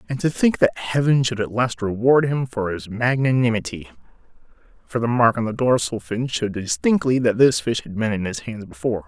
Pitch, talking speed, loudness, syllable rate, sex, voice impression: 115 Hz, 205 wpm, -20 LUFS, 5.5 syllables/s, male, masculine, middle-aged, thick, soft, muffled, slightly cool, calm, friendly, reassuring, wild, lively, slightly kind